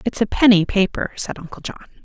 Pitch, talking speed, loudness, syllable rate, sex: 205 Hz, 205 wpm, -18 LUFS, 5.8 syllables/s, female